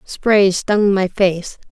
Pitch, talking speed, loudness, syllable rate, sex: 195 Hz, 140 wpm, -15 LUFS, 2.6 syllables/s, female